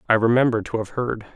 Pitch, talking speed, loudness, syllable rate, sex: 115 Hz, 220 wpm, -21 LUFS, 6.0 syllables/s, male